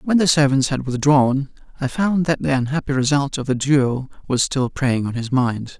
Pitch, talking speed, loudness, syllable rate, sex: 135 Hz, 205 wpm, -19 LUFS, 4.7 syllables/s, male